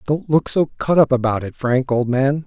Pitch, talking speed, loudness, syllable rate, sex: 135 Hz, 245 wpm, -18 LUFS, 4.6 syllables/s, male